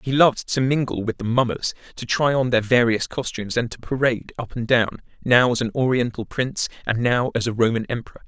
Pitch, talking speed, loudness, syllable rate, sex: 120 Hz, 215 wpm, -21 LUFS, 5.9 syllables/s, male